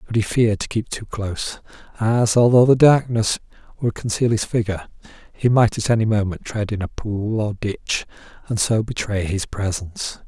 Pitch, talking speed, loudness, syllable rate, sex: 110 Hz, 180 wpm, -20 LUFS, 5.1 syllables/s, male